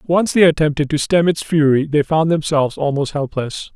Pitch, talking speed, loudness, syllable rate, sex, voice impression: 150 Hz, 190 wpm, -16 LUFS, 5.3 syllables/s, male, masculine, middle-aged, powerful, slightly hard, nasal, intellectual, sincere, calm, slightly friendly, wild, lively, strict